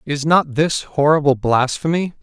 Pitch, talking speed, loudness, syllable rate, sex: 150 Hz, 135 wpm, -17 LUFS, 4.4 syllables/s, male